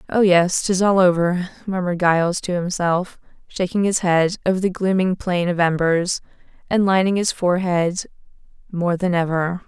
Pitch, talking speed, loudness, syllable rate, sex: 180 Hz, 150 wpm, -19 LUFS, 4.9 syllables/s, female